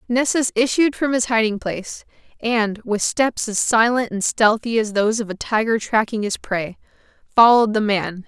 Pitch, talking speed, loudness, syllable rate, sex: 225 Hz, 175 wpm, -19 LUFS, 4.9 syllables/s, female